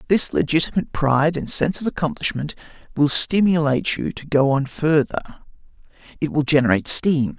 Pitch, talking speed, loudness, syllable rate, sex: 150 Hz, 145 wpm, -20 LUFS, 5.9 syllables/s, male